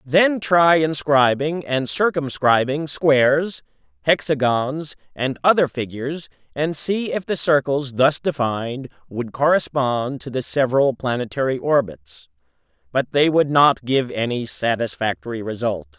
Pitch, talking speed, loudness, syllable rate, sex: 135 Hz, 120 wpm, -20 LUFS, 4.3 syllables/s, male